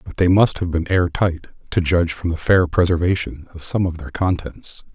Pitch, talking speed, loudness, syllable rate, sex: 85 Hz, 220 wpm, -19 LUFS, 5.3 syllables/s, male